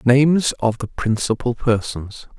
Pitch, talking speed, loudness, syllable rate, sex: 120 Hz, 125 wpm, -19 LUFS, 4.2 syllables/s, male